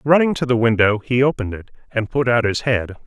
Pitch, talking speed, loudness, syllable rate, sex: 120 Hz, 235 wpm, -18 LUFS, 6.1 syllables/s, male